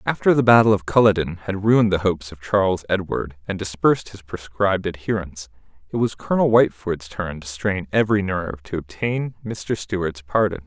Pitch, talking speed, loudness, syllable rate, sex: 95 Hz, 175 wpm, -21 LUFS, 5.5 syllables/s, male